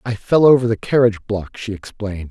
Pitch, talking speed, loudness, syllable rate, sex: 110 Hz, 210 wpm, -17 LUFS, 5.9 syllables/s, male